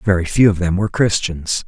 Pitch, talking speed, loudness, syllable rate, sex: 95 Hz, 215 wpm, -17 LUFS, 5.7 syllables/s, male